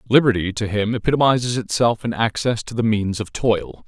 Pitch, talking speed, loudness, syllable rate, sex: 110 Hz, 185 wpm, -20 LUFS, 5.4 syllables/s, male